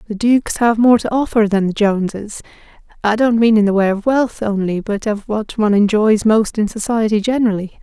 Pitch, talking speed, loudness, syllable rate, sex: 215 Hz, 200 wpm, -15 LUFS, 5.6 syllables/s, female